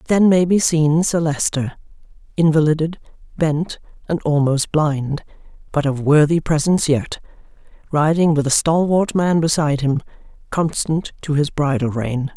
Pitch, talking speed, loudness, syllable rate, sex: 155 Hz, 125 wpm, -18 LUFS, 4.7 syllables/s, female